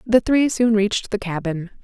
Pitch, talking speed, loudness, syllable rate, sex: 215 Hz, 195 wpm, -20 LUFS, 4.9 syllables/s, female